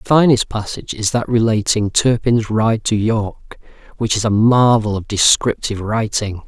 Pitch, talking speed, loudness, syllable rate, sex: 110 Hz, 160 wpm, -16 LUFS, 4.6 syllables/s, male